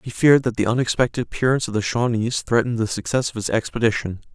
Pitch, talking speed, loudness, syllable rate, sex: 115 Hz, 205 wpm, -21 LUFS, 7.0 syllables/s, male